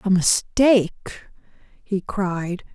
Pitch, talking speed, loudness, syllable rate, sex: 195 Hz, 90 wpm, -21 LUFS, 3.5 syllables/s, female